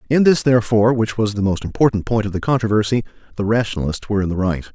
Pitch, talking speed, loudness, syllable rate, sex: 110 Hz, 225 wpm, -18 LUFS, 7.3 syllables/s, male